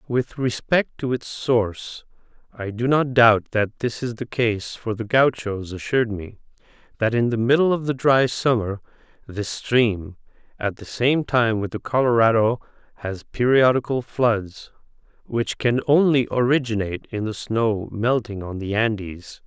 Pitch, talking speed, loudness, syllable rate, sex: 115 Hz, 155 wpm, -21 LUFS, 4.3 syllables/s, male